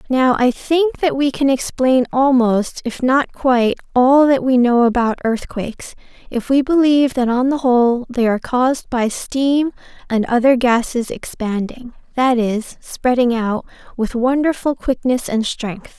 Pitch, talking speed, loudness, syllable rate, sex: 250 Hz, 160 wpm, -17 LUFS, 4.3 syllables/s, female